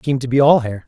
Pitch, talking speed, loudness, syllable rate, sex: 130 Hz, 345 wpm, -15 LUFS, 8.1 syllables/s, male